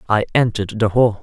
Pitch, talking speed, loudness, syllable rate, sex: 110 Hz, 195 wpm, -17 LUFS, 6.2 syllables/s, male